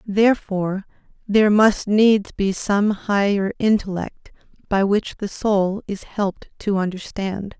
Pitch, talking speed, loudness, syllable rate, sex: 200 Hz, 125 wpm, -20 LUFS, 4.0 syllables/s, female